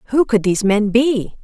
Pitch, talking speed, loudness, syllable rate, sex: 225 Hz, 210 wpm, -16 LUFS, 5.6 syllables/s, female